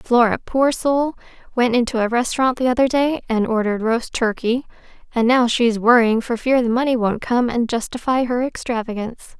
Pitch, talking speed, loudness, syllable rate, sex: 240 Hz, 180 wpm, -19 LUFS, 5.3 syllables/s, female